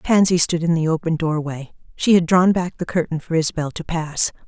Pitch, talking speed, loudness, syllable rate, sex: 165 Hz, 215 wpm, -19 LUFS, 5.5 syllables/s, female